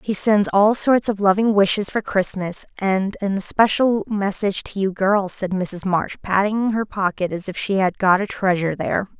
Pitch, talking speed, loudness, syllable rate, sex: 200 Hz, 195 wpm, -20 LUFS, 4.8 syllables/s, female